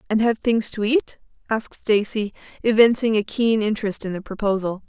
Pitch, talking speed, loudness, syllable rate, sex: 215 Hz, 170 wpm, -21 LUFS, 5.4 syllables/s, female